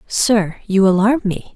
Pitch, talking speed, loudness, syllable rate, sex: 205 Hz, 155 wpm, -16 LUFS, 3.9 syllables/s, female